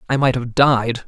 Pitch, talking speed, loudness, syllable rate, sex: 125 Hz, 225 wpm, -17 LUFS, 4.7 syllables/s, male